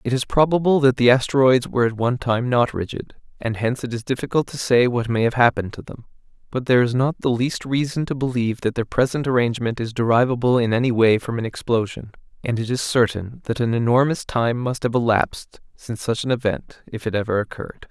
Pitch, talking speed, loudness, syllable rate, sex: 120 Hz, 220 wpm, -20 LUFS, 6.1 syllables/s, male